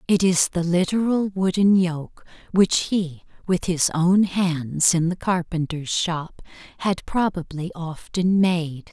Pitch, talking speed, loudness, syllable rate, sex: 175 Hz, 135 wpm, -22 LUFS, 3.6 syllables/s, female